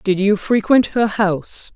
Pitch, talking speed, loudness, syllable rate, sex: 205 Hz, 170 wpm, -17 LUFS, 4.2 syllables/s, female